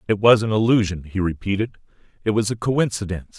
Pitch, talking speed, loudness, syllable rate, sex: 105 Hz, 175 wpm, -21 LUFS, 6.4 syllables/s, male